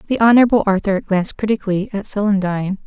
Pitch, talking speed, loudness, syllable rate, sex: 200 Hz, 145 wpm, -17 LUFS, 6.9 syllables/s, female